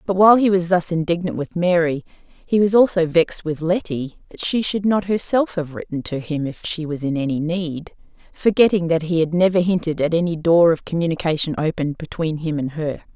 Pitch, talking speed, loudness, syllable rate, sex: 170 Hz, 205 wpm, -20 LUFS, 5.4 syllables/s, female